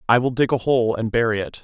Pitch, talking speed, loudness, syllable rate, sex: 120 Hz, 295 wpm, -20 LUFS, 6.1 syllables/s, male